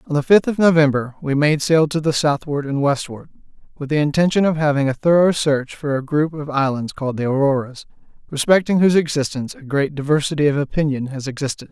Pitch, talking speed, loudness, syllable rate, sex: 145 Hz, 200 wpm, -18 LUFS, 6.0 syllables/s, male